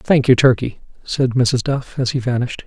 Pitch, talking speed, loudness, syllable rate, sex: 125 Hz, 205 wpm, -17 LUFS, 5.0 syllables/s, male